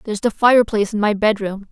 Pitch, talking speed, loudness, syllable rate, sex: 210 Hz, 210 wpm, -17 LUFS, 6.9 syllables/s, female